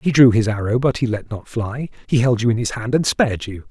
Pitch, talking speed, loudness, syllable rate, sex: 120 Hz, 290 wpm, -19 LUFS, 5.9 syllables/s, male